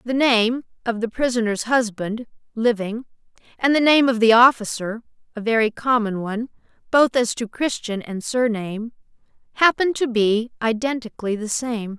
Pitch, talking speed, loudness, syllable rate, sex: 230 Hz, 145 wpm, -20 LUFS, 4.0 syllables/s, female